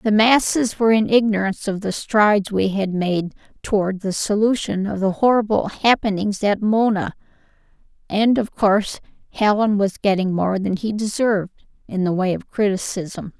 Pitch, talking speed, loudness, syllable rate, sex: 205 Hz, 155 wpm, -19 LUFS, 4.9 syllables/s, female